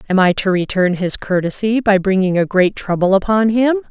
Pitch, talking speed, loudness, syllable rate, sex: 200 Hz, 200 wpm, -15 LUFS, 5.2 syllables/s, female